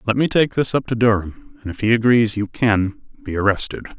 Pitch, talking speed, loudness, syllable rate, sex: 115 Hz, 225 wpm, -18 LUFS, 5.6 syllables/s, male